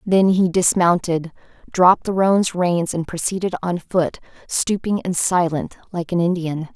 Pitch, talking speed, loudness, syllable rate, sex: 175 Hz, 150 wpm, -19 LUFS, 4.4 syllables/s, female